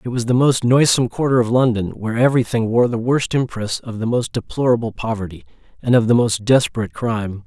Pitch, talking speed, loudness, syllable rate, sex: 115 Hz, 210 wpm, -18 LUFS, 6.2 syllables/s, male